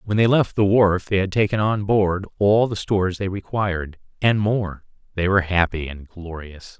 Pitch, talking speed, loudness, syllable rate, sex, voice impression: 95 Hz, 195 wpm, -20 LUFS, 4.8 syllables/s, male, masculine, adult-like, slightly thin, tensed, bright, slightly hard, clear, slightly nasal, cool, calm, friendly, reassuring, wild, lively, slightly kind